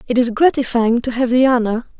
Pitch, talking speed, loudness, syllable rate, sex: 245 Hz, 210 wpm, -16 LUFS, 5.7 syllables/s, female